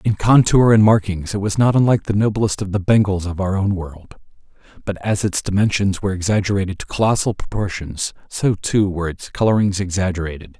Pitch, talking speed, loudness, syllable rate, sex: 100 Hz, 180 wpm, -18 LUFS, 5.8 syllables/s, male